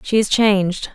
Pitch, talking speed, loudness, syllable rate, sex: 200 Hz, 190 wpm, -17 LUFS, 4.7 syllables/s, female